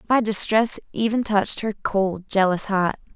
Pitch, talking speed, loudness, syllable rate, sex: 205 Hz, 150 wpm, -21 LUFS, 4.7 syllables/s, female